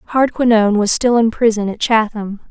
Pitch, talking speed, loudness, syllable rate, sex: 220 Hz, 170 wpm, -15 LUFS, 5.5 syllables/s, female